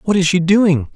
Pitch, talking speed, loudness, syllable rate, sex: 180 Hz, 250 wpm, -14 LUFS, 4.6 syllables/s, male